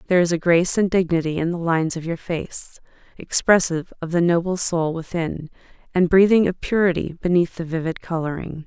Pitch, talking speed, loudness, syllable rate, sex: 170 Hz, 180 wpm, -20 LUFS, 5.7 syllables/s, female